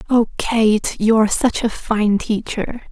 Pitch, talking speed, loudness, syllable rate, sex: 220 Hz, 165 wpm, -18 LUFS, 4.0 syllables/s, female